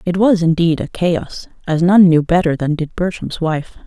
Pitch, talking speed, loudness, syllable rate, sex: 170 Hz, 200 wpm, -15 LUFS, 4.6 syllables/s, female